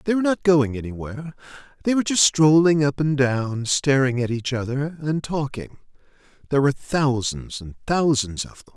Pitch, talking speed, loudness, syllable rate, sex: 140 Hz, 165 wpm, -21 LUFS, 5.4 syllables/s, male